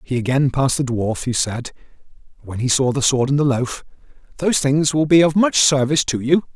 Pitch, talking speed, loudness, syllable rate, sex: 135 Hz, 220 wpm, -18 LUFS, 5.7 syllables/s, male